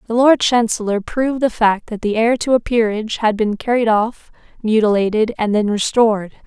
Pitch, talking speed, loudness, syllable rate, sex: 225 Hz, 185 wpm, -17 LUFS, 5.3 syllables/s, female